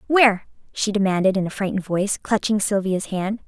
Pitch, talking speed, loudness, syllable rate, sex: 200 Hz, 175 wpm, -21 LUFS, 6.0 syllables/s, female